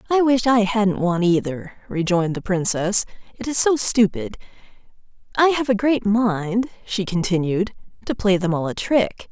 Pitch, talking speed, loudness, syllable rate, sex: 205 Hz, 165 wpm, -20 LUFS, 4.7 syllables/s, female